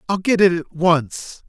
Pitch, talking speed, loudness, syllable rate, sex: 175 Hz, 205 wpm, -17 LUFS, 4.0 syllables/s, male